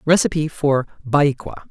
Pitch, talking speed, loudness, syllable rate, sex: 145 Hz, 105 wpm, -19 LUFS, 4.8 syllables/s, male